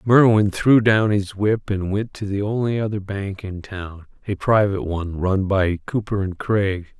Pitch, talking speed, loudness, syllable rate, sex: 100 Hz, 190 wpm, -20 LUFS, 4.4 syllables/s, male